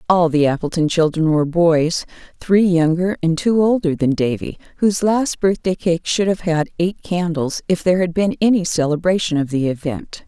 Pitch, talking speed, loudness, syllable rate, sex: 170 Hz, 175 wpm, -18 LUFS, 5.1 syllables/s, female